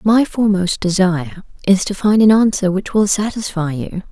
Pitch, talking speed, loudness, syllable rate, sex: 195 Hz, 175 wpm, -16 LUFS, 5.1 syllables/s, female